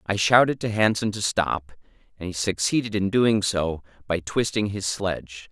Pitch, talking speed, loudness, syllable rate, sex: 100 Hz, 175 wpm, -23 LUFS, 4.6 syllables/s, male